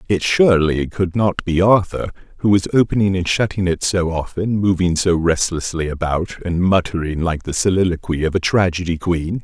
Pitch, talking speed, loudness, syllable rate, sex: 90 Hz, 170 wpm, -18 LUFS, 5.1 syllables/s, male